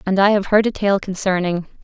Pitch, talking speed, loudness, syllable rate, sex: 195 Hz, 230 wpm, -18 LUFS, 5.6 syllables/s, female